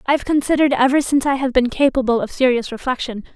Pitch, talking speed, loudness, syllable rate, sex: 260 Hz, 215 wpm, -18 LUFS, 7.1 syllables/s, female